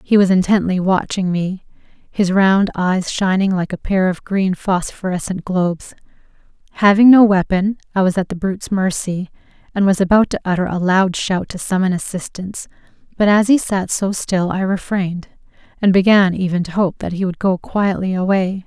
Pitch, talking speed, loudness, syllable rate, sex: 190 Hz, 175 wpm, -17 LUFS, 5.0 syllables/s, female